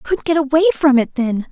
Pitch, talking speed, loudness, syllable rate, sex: 295 Hz, 280 wpm, -15 LUFS, 6.4 syllables/s, female